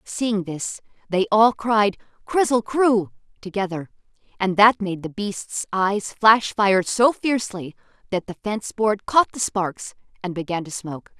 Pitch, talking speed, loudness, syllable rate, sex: 205 Hz, 155 wpm, -21 LUFS, 4.2 syllables/s, female